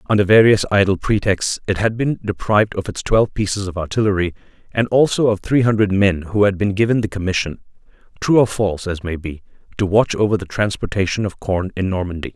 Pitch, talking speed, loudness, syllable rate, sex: 100 Hz, 200 wpm, -18 LUFS, 5.9 syllables/s, male